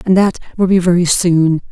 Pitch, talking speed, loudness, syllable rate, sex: 180 Hz, 210 wpm, -13 LUFS, 5.2 syllables/s, female